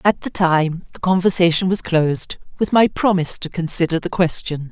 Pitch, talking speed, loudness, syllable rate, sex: 175 Hz, 180 wpm, -18 LUFS, 5.3 syllables/s, female